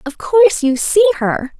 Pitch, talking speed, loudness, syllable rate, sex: 335 Hz, 190 wpm, -14 LUFS, 4.8 syllables/s, female